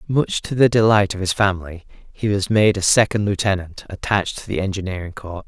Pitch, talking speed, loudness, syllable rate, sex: 100 Hz, 195 wpm, -19 LUFS, 5.7 syllables/s, male